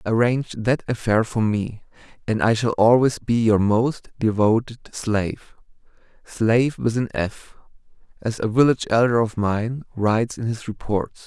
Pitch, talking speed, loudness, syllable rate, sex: 115 Hz, 150 wpm, -21 LUFS, 4.6 syllables/s, male